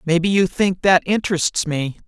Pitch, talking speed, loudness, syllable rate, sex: 175 Hz, 175 wpm, -18 LUFS, 4.7 syllables/s, male